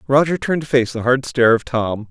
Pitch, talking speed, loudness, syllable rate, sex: 125 Hz, 255 wpm, -17 LUFS, 6.1 syllables/s, male